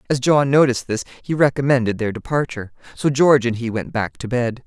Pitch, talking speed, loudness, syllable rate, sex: 125 Hz, 205 wpm, -19 LUFS, 6.0 syllables/s, female